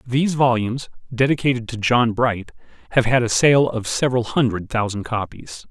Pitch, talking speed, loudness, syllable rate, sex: 120 Hz, 160 wpm, -19 LUFS, 5.3 syllables/s, male